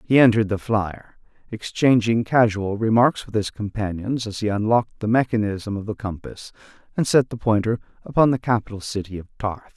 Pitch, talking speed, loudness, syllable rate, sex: 110 Hz, 170 wpm, -21 LUFS, 5.4 syllables/s, male